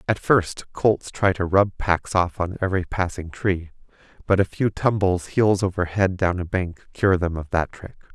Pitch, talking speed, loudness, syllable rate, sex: 95 Hz, 200 wpm, -22 LUFS, 4.4 syllables/s, male